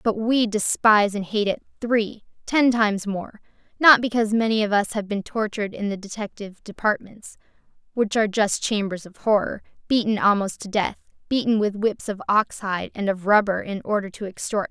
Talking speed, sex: 215 wpm, female